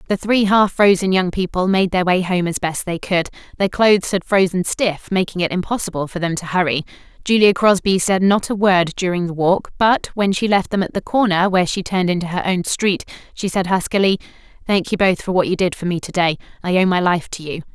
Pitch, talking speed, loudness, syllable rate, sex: 185 Hz, 235 wpm, -18 LUFS, 5.7 syllables/s, female